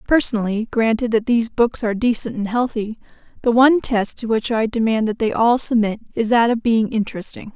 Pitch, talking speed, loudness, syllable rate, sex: 225 Hz, 200 wpm, -18 LUFS, 5.8 syllables/s, female